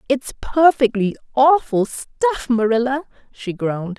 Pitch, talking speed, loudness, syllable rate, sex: 250 Hz, 105 wpm, -18 LUFS, 4.6 syllables/s, female